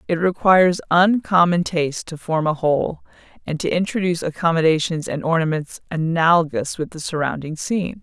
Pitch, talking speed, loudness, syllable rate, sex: 165 Hz, 140 wpm, -19 LUFS, 5.5 syllables/s, female